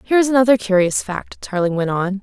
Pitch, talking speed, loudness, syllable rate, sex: 210 Hz, 215 wpm, -17 LUFS, 6.1 syllables/s, female